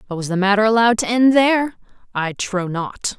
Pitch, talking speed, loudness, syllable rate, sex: 215 Hz, 205 wpm, -17 LUFS, 5.7 syllables/s, female